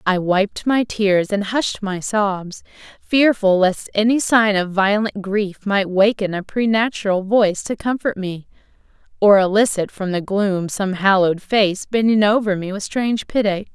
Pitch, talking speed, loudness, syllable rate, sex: 200 Hz, 160 wpm, -18 LUFS, 4.3 syllables/s, female